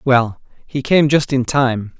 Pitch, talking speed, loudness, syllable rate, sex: 130 Hz, 180 wpm, -16 LUFS, 3.6 syllables/s, male